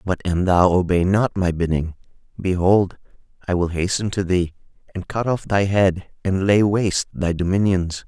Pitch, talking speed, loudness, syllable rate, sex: 95 Hz, 170 wpm, -20 LUFS, 4.6 syllables/s, male